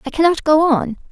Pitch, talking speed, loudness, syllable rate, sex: 300 Hz, 215 wpm, -15 LUFS, 5.6 syllables/s, female